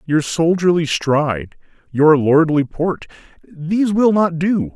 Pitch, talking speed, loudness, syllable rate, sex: 165 Hz, 115 wpm, -16 LUFS, 3.8 syllables/s, male